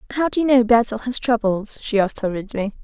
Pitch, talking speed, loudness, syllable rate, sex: 230 Hz, 210 wpm, -19 LUFS, 6.3 syllables/s, female